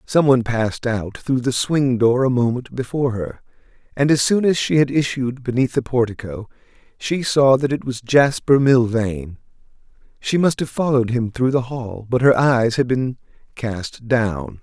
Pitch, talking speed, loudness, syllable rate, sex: 125 Hz, 180 wpm, -19 LUFS, 4.6 syllables/s, male